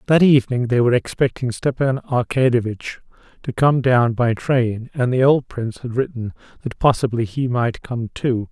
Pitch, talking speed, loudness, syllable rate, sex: 125 Hz, 170 wpm, -19 LUFS, 4.9 syllables/s, male